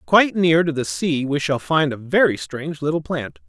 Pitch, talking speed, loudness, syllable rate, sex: 145 Hz, 225 wpm, -20 LUFS, 5.1 syllables/s, male